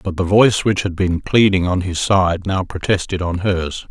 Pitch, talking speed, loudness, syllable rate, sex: 95 Hz, 215 wpm, -17 LUFS, 4.7 syllables/s, male